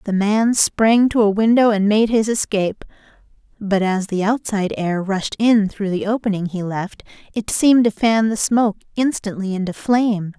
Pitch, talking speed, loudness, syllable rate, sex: 210 Hz, 180 wpm, -18 LUFS, 4.9 syllables/s, female